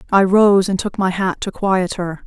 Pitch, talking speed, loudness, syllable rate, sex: 190 Hz, 240 wpm, -17 LUFS, 4.4 syllables/s, female